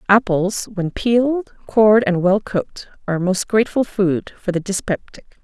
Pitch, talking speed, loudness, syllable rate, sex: 200 Hz, 165 wpm, -18 LUFS, 5.0 syllables/s, female